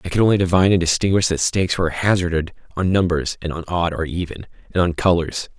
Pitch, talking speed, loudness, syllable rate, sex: 90 Hz, 205 wpm, -19 LUFS, 6.5 syllables/s, male